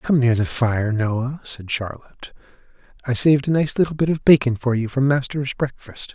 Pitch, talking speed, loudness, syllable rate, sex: 130 Hz, 195 wpm, -20 LUFS, 5.1 syllables/s, male